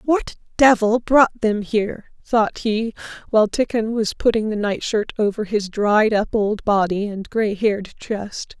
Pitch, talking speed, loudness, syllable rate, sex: 215 Hz, 160 wpm, -20 LUFS, 4.3 syllables/s, female